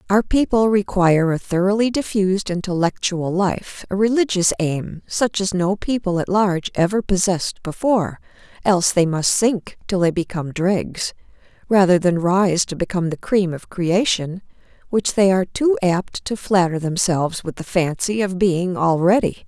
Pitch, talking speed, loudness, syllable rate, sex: 190 Hz, 155 wpm, -19 LUFS, 4.8 syllables/s, female